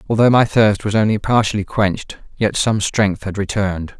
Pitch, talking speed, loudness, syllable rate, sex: 105 Hz, 180 wpm, -17 LUFS, 5.2 syllables/s, male